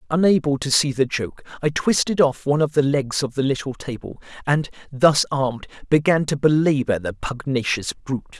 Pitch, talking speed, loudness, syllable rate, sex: 140 Hz, 180 wpm, -21 LUFS, 5.4 syllables/s, male